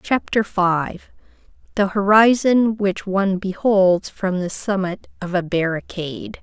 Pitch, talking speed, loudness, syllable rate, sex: 195 Hz, 110 wpm, -19 LUFS, 4.0 syllables/s, female